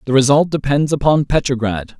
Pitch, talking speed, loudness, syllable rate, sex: 135 Hz, 150 wpm, -16 LUFS, 5.4 syllables/s, male